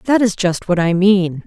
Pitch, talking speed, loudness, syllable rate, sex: 185 Hz, 245 wpm, -15 LUFS, 4.6 syllables/s, female